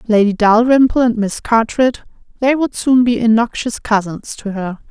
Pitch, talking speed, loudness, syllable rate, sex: 230 Hz, 145 wpm, -15 LUFS, 4.9 syllables/s, female